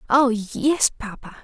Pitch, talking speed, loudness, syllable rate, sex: 245 Hz, 125 wpm, -20 LUFS, 5.4 syllables/s, female